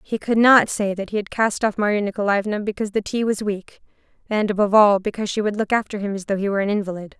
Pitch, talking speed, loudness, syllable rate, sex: 205 Hz, 260 wpm, -20 LUFS, 6.8 syllables/s, female